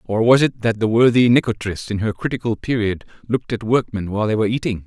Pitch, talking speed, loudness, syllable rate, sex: 110 Hz, 220 wpm, -19 LUFS, 6.4 syllables/s, male